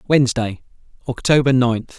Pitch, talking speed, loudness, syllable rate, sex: 125 Hz, 90 wpm, -17 LUFS, 5.0 syllables/s, male